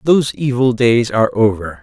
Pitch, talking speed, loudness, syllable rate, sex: 120 Hz, 165 wpm, -15 LUFS, 5.4 syllables/s, male